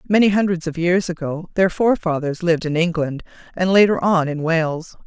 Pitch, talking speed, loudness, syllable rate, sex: 170 Hz, 180 wpm, -19 LUFS, 5.4 syllables/s, female